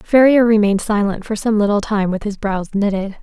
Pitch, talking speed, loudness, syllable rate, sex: 210 Hz, 205 wpm, -16 LUFS, 5.4 syllables/s, female